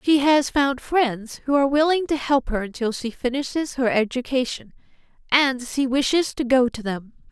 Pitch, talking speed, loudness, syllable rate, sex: 265 Hz, 180 wpm, -21 LUFS, 4.8 syllables/s, female